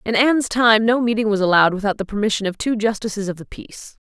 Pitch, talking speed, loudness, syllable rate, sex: 215 Hz, 235 wpm, -18 LUFS, 6.7 syllables/s, female